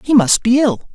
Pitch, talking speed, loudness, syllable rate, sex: 245 Hz, 255 wpm, -14 LUFS, 4.9 syllables/s, female